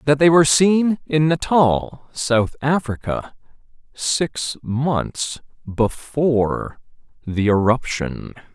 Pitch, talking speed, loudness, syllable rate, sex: 135 Hz, 90 wpm, -19 LUFS, 3.1 syllables/s, male